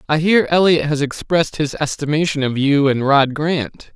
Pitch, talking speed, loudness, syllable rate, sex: 150 Hz, 180 wpm, -17 LUFS, 4.8 syllables/s, male